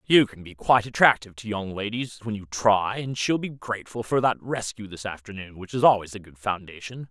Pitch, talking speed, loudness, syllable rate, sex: 110 Hz, 220 wpm, -25 LUFS, 5.6 syllables/s, male